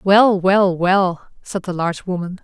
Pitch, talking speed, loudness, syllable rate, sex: 185 Hz, 175 wpm, -17 LUFS, 4.1 syllables/s, female